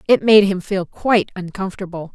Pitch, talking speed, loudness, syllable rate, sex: 190 Hz, 170 wpm, -17 LUFS, 5.6 syllables/s, female